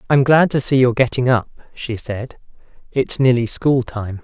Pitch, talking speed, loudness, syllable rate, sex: 125 Hz, 185 wpm, -17 LUFS, 4.9 syllables/s, male